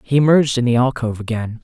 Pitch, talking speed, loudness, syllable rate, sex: 125 Hz, 220 wpm, -17 LUFS, 7.2 syllables/s, male